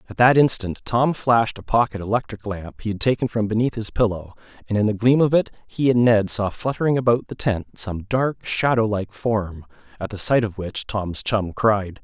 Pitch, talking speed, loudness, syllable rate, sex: 110 Hz, 215 wpm, -21 LUFS, 5.1 syllables/s, male